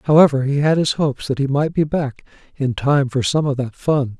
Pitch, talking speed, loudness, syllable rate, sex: 140 Hz, 245 wpm, -18 LUFS, 5.2 syllables/s, male